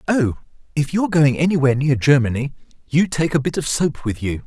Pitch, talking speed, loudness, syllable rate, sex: 145 Hz, 200 wpm, -19 LUFS, 5.8 syllables/s, male